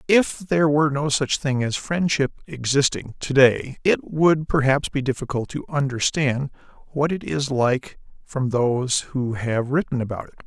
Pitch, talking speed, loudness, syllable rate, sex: 140 Hz, 165 wpm, -22 LUFS, 4.6 syllables/s, male